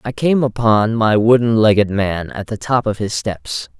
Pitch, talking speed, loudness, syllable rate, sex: 110 Hz, 205 wpm, -16 LUFS, 4.4 syllables/s, male